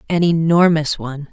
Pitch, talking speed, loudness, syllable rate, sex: 160 Hz, 135 wpm, -16 LUFS, 5.3 syllables/s, female